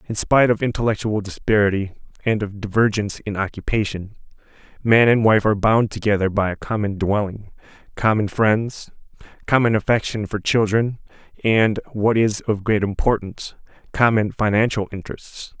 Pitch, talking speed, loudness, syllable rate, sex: 105 Hz, 135 wpm, -20 LUFS, 5.2 syllables/s, male